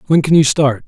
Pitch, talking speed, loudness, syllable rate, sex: 145 Hz, 275 wpm, -13 LUFS, 5.6 syllables/s, male